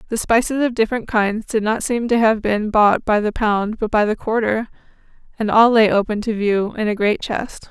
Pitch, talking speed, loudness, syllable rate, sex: 220 Hz, 225 wpm, -18 LUFS, 5.0 syllables/s, female